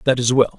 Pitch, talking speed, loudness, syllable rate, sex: 125 Hz, 305 wpm, -17 LUFS, 6.4 syllables/s, male